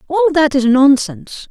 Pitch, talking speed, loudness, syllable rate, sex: 300 Hz, 160 wpm, -12 LUFS, 5.1 syllables/s, female